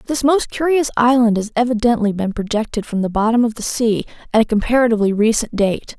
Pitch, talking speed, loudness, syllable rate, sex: 230 Hz, 190 wpm, -17 LUFS, 5.9 syllables/s, female